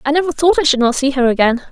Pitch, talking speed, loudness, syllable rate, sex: 280 Hz, 315 wpm, -14 LUFS, 7.1 syllables/s, female